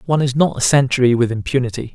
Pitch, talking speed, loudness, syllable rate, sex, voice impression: 130 Hz, 215 wpm, -16 LUFS, 7.2 syllables/s, male, masculine, adult-like, slightly muffled, sincere, calm, slightly modest